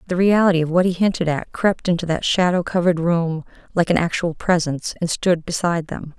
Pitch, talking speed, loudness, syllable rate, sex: 170 Hz, 205 wpm, -19 LUFS, 5.9 syllables/s, female